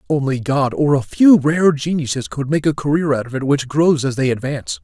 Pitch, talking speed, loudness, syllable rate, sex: 140 Hz, 235 wpm, -17 LUFS, 5.4 syllables/s, male